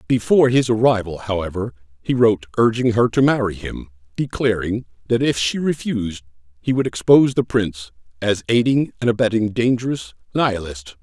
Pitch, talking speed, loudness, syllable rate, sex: 110 Hz, 145 wpm, -19 LUFS, 5.6 syllables/s, male